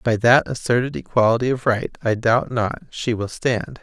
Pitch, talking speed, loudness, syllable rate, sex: 120 Hz, 190 wpm, -20 LUFS, 4.8 syllables/s, male